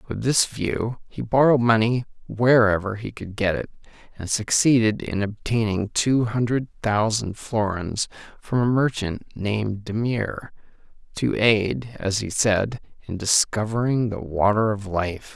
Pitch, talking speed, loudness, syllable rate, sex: 110 Hz, 140 wpm, -22 LUFS, 4.2 syllables/s, male